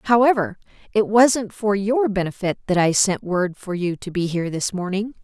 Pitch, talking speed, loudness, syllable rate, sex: 200 Hz, 195 wpm, -20 LUFS, 4.9 syllables/s, female